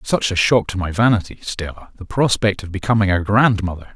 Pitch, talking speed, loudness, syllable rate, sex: 100 Hz, 180 wpm, -18 LUFS, 5.7 syllables/s, male